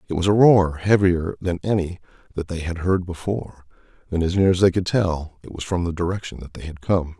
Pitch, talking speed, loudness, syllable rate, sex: 90 Hz, 235 wpm, -21 LUFS, 5.7 syllables/s, male